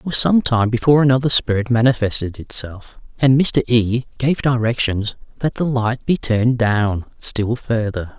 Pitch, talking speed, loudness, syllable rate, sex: 120 Hz, 160 wpm, -18 LUFS, 4.7 syllables/s, male